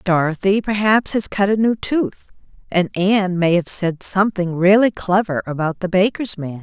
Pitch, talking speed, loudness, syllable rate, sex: 190 Hz, 170 wpm, -18 LUFS, 4.8 syllables/s, female